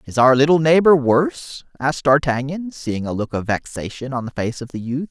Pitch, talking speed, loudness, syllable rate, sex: 135 Hz, 210 wpm, -19 LUFS, 5.4 syllables/s, male